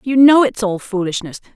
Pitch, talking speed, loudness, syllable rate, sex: 220 Hz, 190 wpm, -15 LUFS, 5.3 syllables/s, female